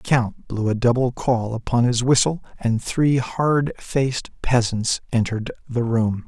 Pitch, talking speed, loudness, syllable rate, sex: 120 Hz, 165 wpm, -21 LUFS, 4.3 syllables/s, male